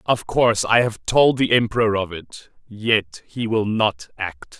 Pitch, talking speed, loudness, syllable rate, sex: 105 Hz, 185 wpm, -20 LUFS, 4.1 syllables/s, male